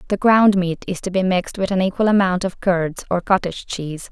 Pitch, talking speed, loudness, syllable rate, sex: 185 Hz, 235 wpm, -19 LUFS, 5.8 syllables/s, female